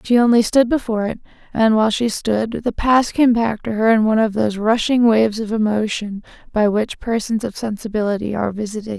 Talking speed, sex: 220 wpm, female